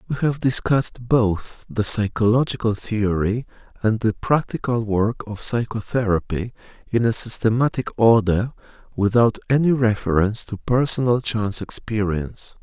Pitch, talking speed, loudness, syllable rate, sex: 110 Hz, 115 wpm, -20 LUFS, 4.7 syllables/s, male